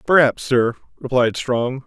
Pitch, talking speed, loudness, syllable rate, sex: 125 Hz, 130 wpm, -19 LUFS, 4.0 syllables/s, male